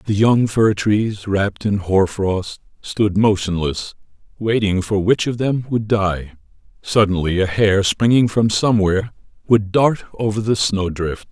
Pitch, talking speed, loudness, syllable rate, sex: 105 Hz, 150 wpm, -18 LUFS, 4.0 syllables/s, male